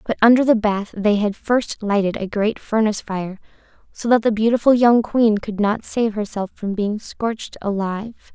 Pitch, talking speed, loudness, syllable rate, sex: 215 Hz, 185 wpm, -19 LUFS, 4.8 syllables/s, female